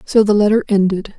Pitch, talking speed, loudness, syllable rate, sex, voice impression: 205 Hz, 200 wpm, -14 LUFS, 5.8 syllables/s, female, feminine, slightly gender-neutral, slightly young, very adult-like, relaxed, weak, dark, slightly soft, clear, fluent, slightly cute, intellectual, sincere, very calm, slightly friendly, reassuring, slightly elegant, slightly sweet, kind, very modest